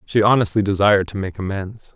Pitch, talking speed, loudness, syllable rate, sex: 100 Hz, 185 wpm, -18 LUFS, 6.0 syllables/s, male